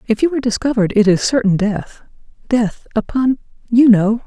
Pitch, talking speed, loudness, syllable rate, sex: 230 Hz, 140 wpm, -16 LUFS, 5.5 syllables/s, female